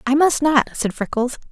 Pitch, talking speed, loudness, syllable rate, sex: 265 Hz, 200 wpm, -19 LUFS, 4.8 syllables/s, female